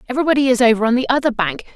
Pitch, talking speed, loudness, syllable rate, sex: 245 Hz, 240 wpm, -16 LUFS, 8.9 syllables/s, female